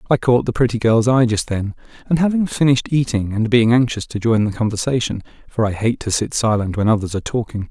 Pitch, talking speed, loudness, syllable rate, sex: 115 Hz, 225 wpm, -18 LUFS, 6.1 syllables/s, male